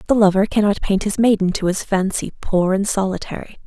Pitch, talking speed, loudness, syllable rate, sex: 200 Hz, 195 wpm, -18 LUFS, 5.7 syllables/s, female